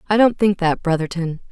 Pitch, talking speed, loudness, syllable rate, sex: 185 Hz, 200 wpm, -18 LUFS, 5.7 syllables/s, female